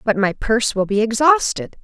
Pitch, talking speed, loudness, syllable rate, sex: 225 Hz, 195 wpm, -17 LUFS, 5.3 syllables/s, female